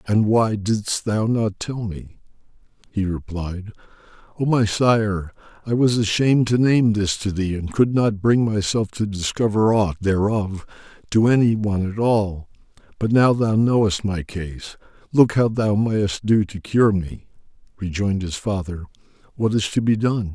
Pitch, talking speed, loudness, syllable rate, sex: 105 Hz, 165 wpm, -20 LUFS, 4.4 syllables/s, male